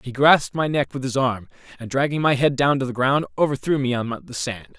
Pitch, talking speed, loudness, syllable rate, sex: 135 Hz, 250 wpm, -21 LUFS, 5.7 syllables/s, male